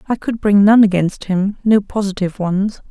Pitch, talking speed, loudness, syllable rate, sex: 200 Hz, 165 wpm, -15 LUFS, 4.9 syllables/s, female